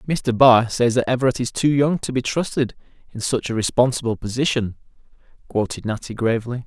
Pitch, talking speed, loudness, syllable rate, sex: 125 Hz, 170 wpm, -20 LUFS, 5.7 syllables/s, male